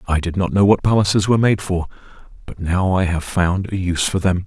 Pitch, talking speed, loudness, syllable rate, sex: 95 Hz, 240 wpm, -18 LUFS, 5.9 syllables/s, male